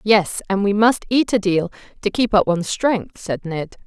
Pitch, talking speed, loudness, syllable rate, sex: 200 Hz, 215 wpm, -19 LUFS, 4.6 syllables/s, female